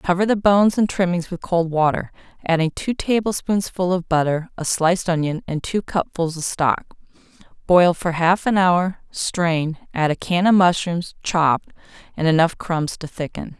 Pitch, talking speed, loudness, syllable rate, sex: 175 Hz, 170 wpm, -20 LUFS, 4.6 syllables/s, female